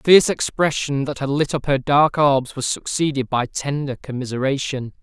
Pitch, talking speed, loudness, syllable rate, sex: 140 Hz, 180 wpm, -20 LUFS, 5.5 syllables/s, male